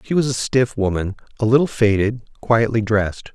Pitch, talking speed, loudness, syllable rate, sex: 115 Hz, 180 wpm, -19 LUFS, 5.4 syllables/s, male